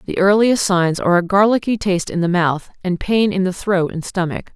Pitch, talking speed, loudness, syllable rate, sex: 185 Hz, 225 wpm, -17 LUFS, 5.4 syllables/s, female